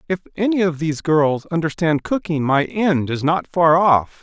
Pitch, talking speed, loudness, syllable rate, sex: 165 Hz, 185 wpm, -18 LUFS, 4.6 syllables/s, male